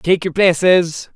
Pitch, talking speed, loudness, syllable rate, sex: 175 Hz, 155 wpm, -14 LUFS, 3.7 syllables/s, male